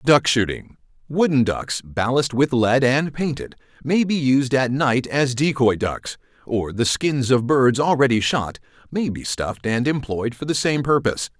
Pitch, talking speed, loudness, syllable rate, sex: 130 Hz, 170 wpm, -20 LUFS, 4.5 syllables/s, male